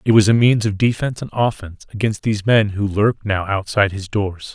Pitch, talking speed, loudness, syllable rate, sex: 105 Hz, 225 wpm, -18 LUFS, 6.0 syllables/s, male